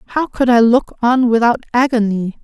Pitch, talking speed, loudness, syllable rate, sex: 235 Hz, 170 wpm, -14 LUFS, 4.6 syllables/s, female